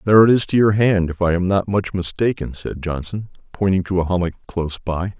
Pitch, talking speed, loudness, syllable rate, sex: 95 Hz, 230 wpm, -19 LUFS, 5.7 syllables/s, male